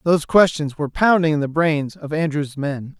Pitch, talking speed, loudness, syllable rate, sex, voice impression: 155 Hz, 200 wpm, -19 LUFS, 5.2 syllables/s, male, masculine, adult-like, tensed, bright, clear, fluent, slightly intellectual, slightly refreshing, friendly, unique, lively, kind